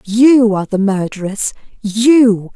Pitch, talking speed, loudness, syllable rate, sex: 215 Hz, 95 wpm, -13 LUFS, 3.7 syllables/s, female